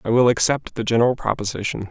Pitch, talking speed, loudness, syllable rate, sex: 115 Hz, 190 wpm, -20 LUFS, 6.7 syllables/s, male